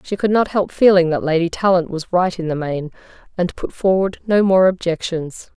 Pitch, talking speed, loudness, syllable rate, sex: 180 Hz, 205 wpm, -17 LUFS, 5.1 syllables/s, female